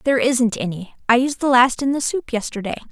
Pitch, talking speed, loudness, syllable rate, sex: 250 Hz, 225 wpm, -19 LUFS, 6.0 syllables/s, female